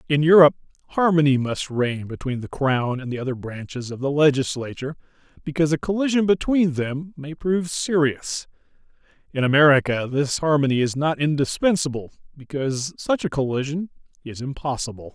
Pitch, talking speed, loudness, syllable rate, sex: 145 Hz, 145 wpm, -22 LUFS, 5.6 syllables/s, male